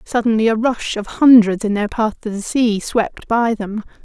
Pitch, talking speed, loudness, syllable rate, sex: 220 Hz, 210 wpm, -17 LUFS, 4.6 syllables/s, female